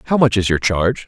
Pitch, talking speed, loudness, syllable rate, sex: 105 Hz, 280 wpm, -16 LUFS, 6.5 syllables/s, male